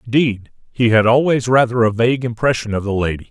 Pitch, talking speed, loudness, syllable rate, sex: 115 Hz, 200 wpm, -16 LUFS, 6.0 syllables/s, male